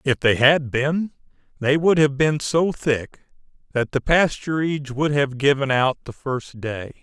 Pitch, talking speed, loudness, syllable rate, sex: 140 Hz, 170 wpm, -21 LUFS, 4.1 syllables/s, male